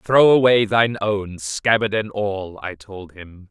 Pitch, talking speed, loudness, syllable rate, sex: 100 Hz, 170 wpm, -18 LUFS, 3.8 syllables/s, male